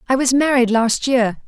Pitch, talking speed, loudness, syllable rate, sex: 250 Hz, 205 wpm, -16 LUFS, 4.6 syllables/s, female